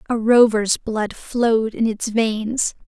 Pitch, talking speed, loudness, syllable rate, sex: 225 Hz, 145 wpm, -19 LUFS, 3.5 syllables/s, female